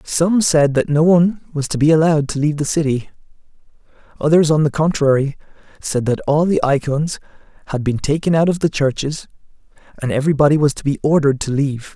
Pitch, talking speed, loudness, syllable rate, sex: 150 Hz, 185 wpm, -17 LUFS, 6.2 syllables/s, male